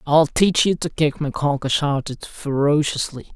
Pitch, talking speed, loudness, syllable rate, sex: 145 Hz, 145 wpm, -20 LUFS, 4.4 syllables/s, male